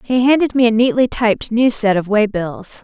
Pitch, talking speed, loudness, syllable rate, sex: 230 Hz, 235 wpm, -15 LUFS, 5.1 syllables/s, female